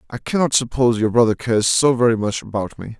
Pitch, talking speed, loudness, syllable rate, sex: 115 Hz, 220 wpm, -18 LUFS, 6.5 syllables/s, male